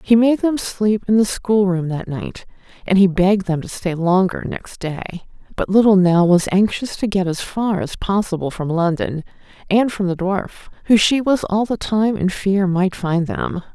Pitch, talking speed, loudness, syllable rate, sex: 190 Hz, 205 wpm, -18 LUFS, 4.6 syllables/s, female